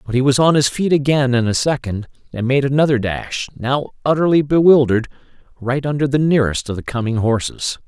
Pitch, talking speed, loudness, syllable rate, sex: 130 Hz, 190 wpm, -17 LUFS, 5.8 syllables/s, male